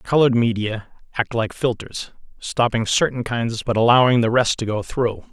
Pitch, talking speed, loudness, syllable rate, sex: 115 Hz, 170 wpm, -20 LUFS, 4.8 syllables/s, male